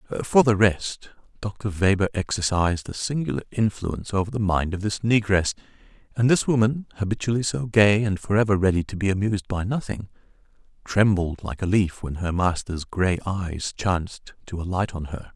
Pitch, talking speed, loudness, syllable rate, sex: 100 Hz, 170 wpm, -23 LUFS, 5.3 syllables/s, male